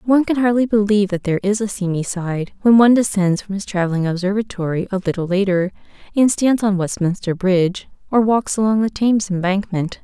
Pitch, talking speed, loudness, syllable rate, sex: 200 Hz, 185 wpm, -18 LUFS, 5.9 syllables/s, female